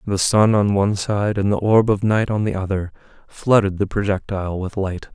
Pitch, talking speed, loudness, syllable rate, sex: 100 Hz, 210 wpm, -19 LUFS, 5.2 syllables/s, male